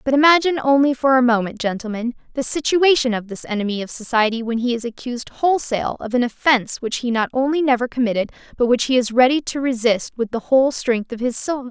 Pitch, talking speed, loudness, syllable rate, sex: 250 Hz, 215 wpm, -19 LUFS, 6.3 syllables/s, female